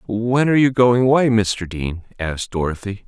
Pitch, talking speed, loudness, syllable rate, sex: 110 Hz, 175 wpm, -18 LUFS, 5.2 syllables/s, male